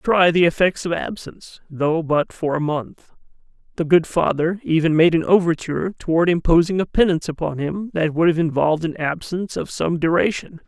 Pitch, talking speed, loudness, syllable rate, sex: 165 Hz, 180 wpm, -19 LUFS, 5.3 syllables/s, male